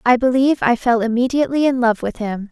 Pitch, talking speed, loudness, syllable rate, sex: 245 Hz, 215 wpm, -17 LUFS, 6.3 syllables/s, female